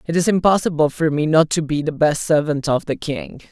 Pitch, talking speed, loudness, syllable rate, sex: 150 Hz, 240 wpm, -18 LUFS, 5.4 syllables/s, male